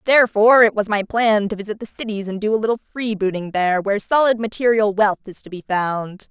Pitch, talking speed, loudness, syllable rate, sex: 210 Hz, 220 wpm, -18 LUFS, 6.0 syllables/s, female